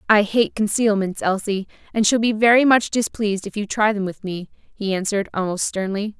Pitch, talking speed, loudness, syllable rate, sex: 205 Hz, 195 wpm, -20 LUFS, 5.3 syllables/s, female